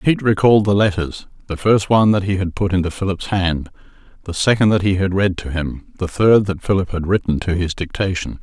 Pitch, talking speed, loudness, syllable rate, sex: 95 Hz, 215 wpm, -18 LUFS, 5.7 syllables/s, male